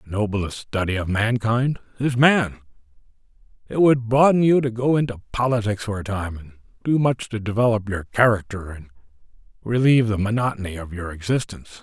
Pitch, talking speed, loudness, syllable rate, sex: 110 Hz, 160 wpm, -21 LUFS, 5.5 syllables/s, male